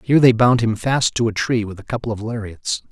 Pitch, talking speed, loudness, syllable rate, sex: 115 Hz, 265 wpm, -19 LUFS, 5.7 syllables/s, male